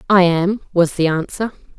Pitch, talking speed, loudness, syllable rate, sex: 180 Hz, 170 wpm, -17 LUFS, 4.7 syllables/s, female